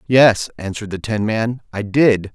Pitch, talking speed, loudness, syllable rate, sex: 110 Hz, 180 wpm, -18 LUFS, 4.4 syllables/s, male